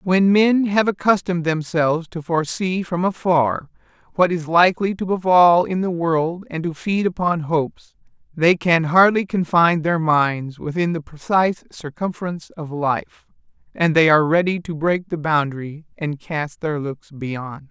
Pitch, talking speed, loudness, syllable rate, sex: 165 Hz, 160 wpm, -19 LUFS, 4.6 syllables/s, male